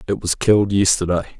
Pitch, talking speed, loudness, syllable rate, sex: 95 Hz, 170 wpm, -17 LUFS, 6.5 syllables/s, male